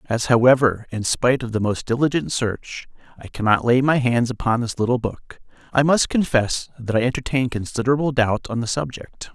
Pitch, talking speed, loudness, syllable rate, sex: 120 Hz, 185 wpm, -20 LUFS, 5.3 syllables/s, male